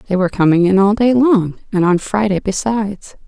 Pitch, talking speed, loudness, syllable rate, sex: 200 Hz, 200 wpm, -15 LUFS, 5.6 syllables/s, female